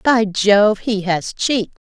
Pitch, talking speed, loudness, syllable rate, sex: 210 Hz, 155 wpm, -16 LUFS, 3.1 syllables/s, female